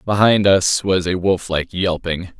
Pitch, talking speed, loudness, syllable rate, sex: 90 Hz, 150 wpm, -17 LUFS, 4.4 syllables/s, male